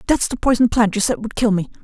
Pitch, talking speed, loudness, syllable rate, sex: 225 Hz, 295 wpm, -18 LUFS, 6.5 syllables/s, female